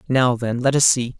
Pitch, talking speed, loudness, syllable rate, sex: 125 Hz, 250 wpm, -18 LUFS, 5.0 syllables/s, male